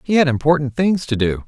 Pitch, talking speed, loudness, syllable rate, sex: 145 Hz, 245 wpm, -17 LUFS, 5.8 syllables/s, male